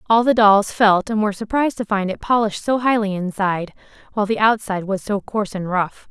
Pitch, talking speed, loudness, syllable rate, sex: 210 Hz, 215 wpm, -19 LUFS, 6.2 syllables/s, female